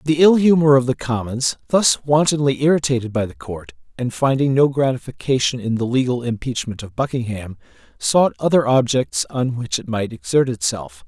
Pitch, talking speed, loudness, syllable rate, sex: 130 Hz, 170 wpm, -18 LUFS, 5.2 syllables/s, male